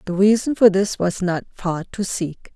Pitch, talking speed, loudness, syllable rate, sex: 195 Hz, 210 wpm, -20 LUFS, 4.4 syllables/s, female